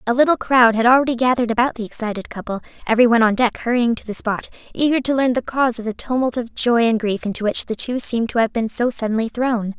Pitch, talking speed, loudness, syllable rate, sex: 235 Hz, 250 wpm, -19 LUFS, 6.7 syllables/s, female